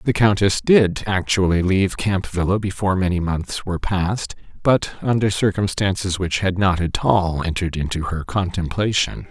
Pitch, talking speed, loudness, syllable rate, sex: 95 Hz, 155 wpm, -20 LUFS, 4.9 syllables/s, male